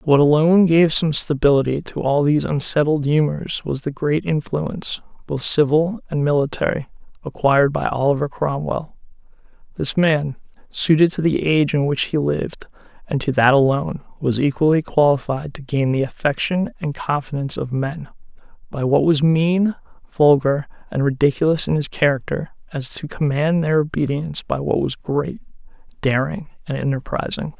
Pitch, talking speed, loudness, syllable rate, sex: 145 Hz, 150 wpm, -19 LUFS, 5.1 syllables/s, male